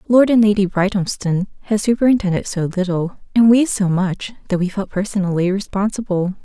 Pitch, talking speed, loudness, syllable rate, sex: 200 Hz, 160 wpm, -18 LUFS, 5.5 syllables/s, female